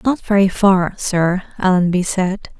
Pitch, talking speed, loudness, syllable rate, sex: 190 Hz, 140 wpm, -16 LUFS, 4.2 syllables/s, female